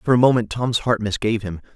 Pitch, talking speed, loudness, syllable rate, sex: 110 Hz, 240 wpm, -20 LUFS, 6.5 syllables/s, male